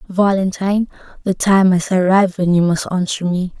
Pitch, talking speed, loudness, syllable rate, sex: 185 Hz, 165 wpm, -16 LUFS, 5.3 syllables/s, female